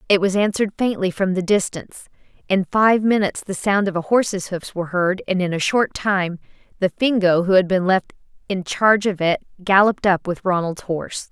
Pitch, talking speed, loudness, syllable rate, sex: 190 Hz, 200 wpm, -19 LUFS, 5.4 syllables/s, female